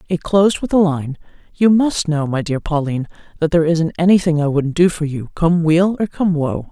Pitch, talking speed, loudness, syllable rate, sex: 165 Hz, 225 wpm, -16 LUFS, 5.4 syllables/s, female